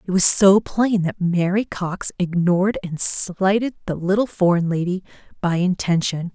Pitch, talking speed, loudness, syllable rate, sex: 185 Hz, 150 wpm, -20 LUFS, 4.5 syllables/s, female